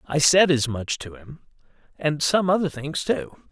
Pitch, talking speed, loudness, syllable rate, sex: 150 Hz, 170 wpm, -22 LUFS, 4.1 syllables/s, male